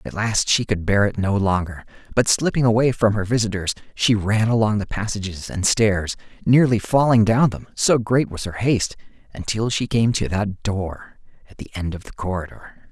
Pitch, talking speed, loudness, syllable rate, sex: 105 Hz, 195 wpm, -20 LUFS, 5.0 syllables/s, male